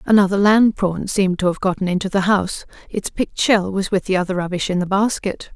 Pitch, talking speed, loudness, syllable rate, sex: 195 Hz, 225 wpm, -19 LUFS, 6.0 syllables/s, female